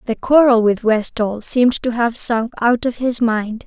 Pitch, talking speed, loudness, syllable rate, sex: 235 Hz, 195 wpm, -16 LUFS, 4.4 syllables/s, female